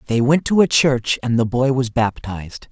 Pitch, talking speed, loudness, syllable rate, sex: 125 Hz, 220 wpm, -17 LUFS, 4.7 syllables/s, male